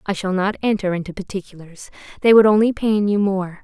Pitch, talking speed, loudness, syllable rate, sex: 195 Hz, 180 wpm, -18 LUFS, 5.8 syllables/s, female